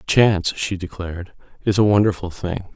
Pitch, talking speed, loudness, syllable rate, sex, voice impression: 95 Hz, 150 wpm, -20 LUFS, 5.3 syllables/s, male, very masculine, very middle-aged, very thick, tensed, very powerful, bright, soft, slightly muffled, slightly fluent, raspy, cool, very intellectual, refreshing, sincere, very calm, very mature, friendly, reassuring, very unique, elegant, wild, slightly sweet, lively, very kind, modest